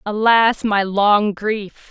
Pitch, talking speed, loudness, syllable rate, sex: 210 Hz, 125 wpm, -16 LUFS, 2.8 syllables/s, female